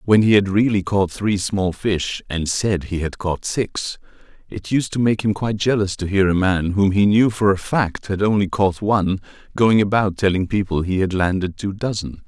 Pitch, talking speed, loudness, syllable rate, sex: 100 Hz, 215 wpm, -19 LUFS, 4.8 syllables/s, male